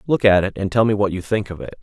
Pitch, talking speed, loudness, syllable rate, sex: 100 Hz, 360 wpm, -18 LUFS, 6.7 syllables/s, male